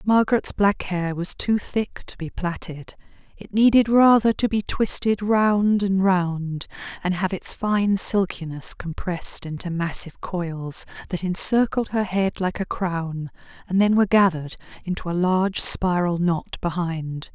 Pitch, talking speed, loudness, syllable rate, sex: 185 Hz, 150 wpm, -22 LUFS, 4.2 syllables/s, female